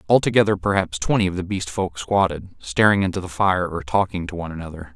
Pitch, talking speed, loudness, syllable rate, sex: 90 Hz, 205 wpm, -21 LUFS, 6.2 syllables/s, male